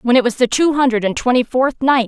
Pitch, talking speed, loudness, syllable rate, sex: 250 Hz, 290 wpm, -15 LUFS, 5.9 syllables/s, female